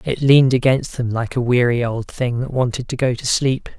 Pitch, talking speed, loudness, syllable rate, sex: 125 Hz, 240 wpm, -18 LUFS, 5.2 syllables/s, male